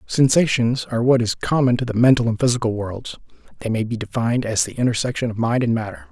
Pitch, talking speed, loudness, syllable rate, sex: 120 Hz, 215 wpm, -19 LUFS, 6.4 syllables/s, male